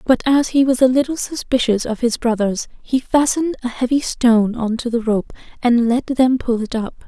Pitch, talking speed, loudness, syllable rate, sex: 245 Hz, 210 wpm, -18 LUFS, 5.1 syllables/s, female